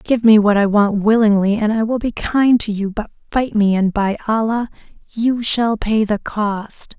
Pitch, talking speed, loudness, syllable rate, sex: 215 Hz, 205 wpm, -16 LUFS, 4.4 syllables/s, female